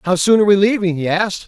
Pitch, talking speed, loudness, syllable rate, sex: 190 Hz, 285 wpm, -15 LUFS, 7.4 syllables/s, male